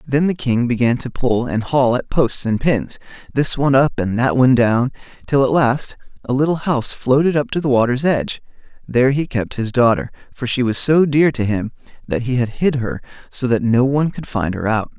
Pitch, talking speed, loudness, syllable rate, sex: 125 Hz, 225 wpm, -17 LUFS, 5.3 syllables/s, male